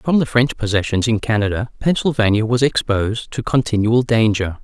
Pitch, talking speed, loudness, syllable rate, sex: 115 Hz, 155 wpm, -17 LUFS, 5.3 syllables/s, male